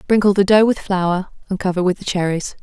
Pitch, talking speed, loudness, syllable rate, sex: 190 Hz, 230 wpm, -17 LUFS, 5.6 syllables/s, female